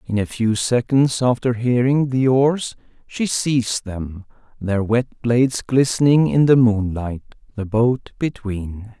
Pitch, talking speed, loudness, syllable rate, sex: 120 Hz, 140 wpm, -19 LUFS, 3.8 syllables/s, male